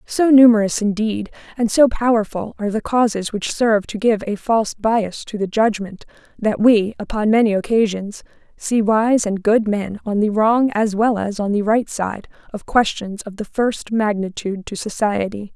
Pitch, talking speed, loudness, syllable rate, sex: 215 Hz, 180 wpm, -18 LUFS, 4.7 syllables/s, female